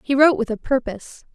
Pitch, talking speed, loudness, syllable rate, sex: 260 Hz, 225 wpm, -19 LUFS, 6.7 syllables/s, female